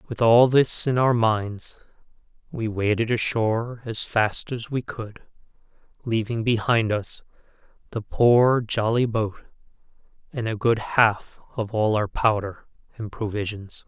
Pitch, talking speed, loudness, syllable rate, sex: 110 Hz, 135 wpm, -23 LUFS, 3.9 syllables/s, male